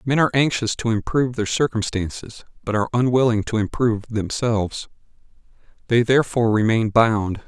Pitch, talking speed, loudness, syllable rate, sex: 115 Hz, 135 wpm, -20 LUFS, 5.7 syllables/s, male